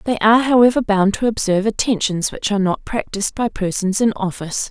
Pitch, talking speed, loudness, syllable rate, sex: 210 Hz, 190 wpm, -17 LUFS, 6.1 syllables/s, female